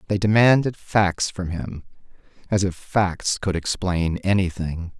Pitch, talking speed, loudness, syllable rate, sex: 95 Hz, 130 wpm, -22 LUFS, 3.9 syllables/s, male